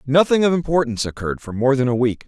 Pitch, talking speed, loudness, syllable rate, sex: 135 Hz, 235 wpm, -19 LUFS, 7.0 syllables/s, male